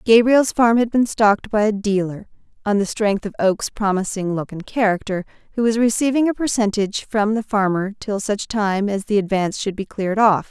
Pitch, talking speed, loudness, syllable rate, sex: 210 Hz, 190 wpm, -19 LUFS, 5.3 syllables/s, female